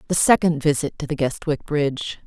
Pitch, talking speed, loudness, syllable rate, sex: 150 Hz, 185 wpm, -21 LUFS, 5.5 syllables/s, female